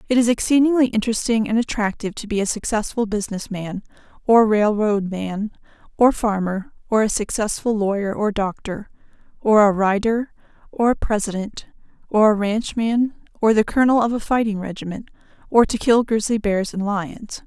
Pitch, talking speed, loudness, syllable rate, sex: 215 Hz, 160 wpm, -20 LUFS, 5.2 syllables/s, female